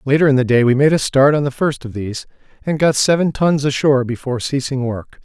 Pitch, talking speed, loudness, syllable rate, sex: 135 Hz, 240 wpm, -16 LUFS, 6.1 syllables/s, male